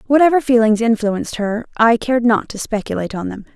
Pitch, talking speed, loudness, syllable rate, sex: 230 Hz, 185 wpm, -16 LUFS, 6.3 syllables/s, female